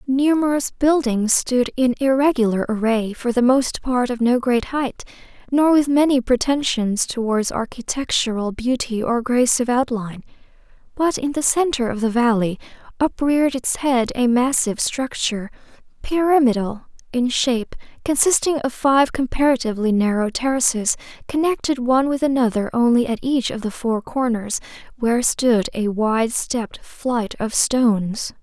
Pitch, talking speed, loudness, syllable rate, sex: 245 Hz, 140 wpm, -19 LUFS, 4.8 syllables/s, female